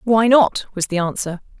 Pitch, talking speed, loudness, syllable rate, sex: 205 Hz, 190 wpm, -18 LUFS, 4.8 syllables/s, female